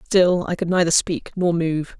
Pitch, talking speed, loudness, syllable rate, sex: 175 Hz, 210 wpm, -20 LUFS, 4.4 syllables/s, female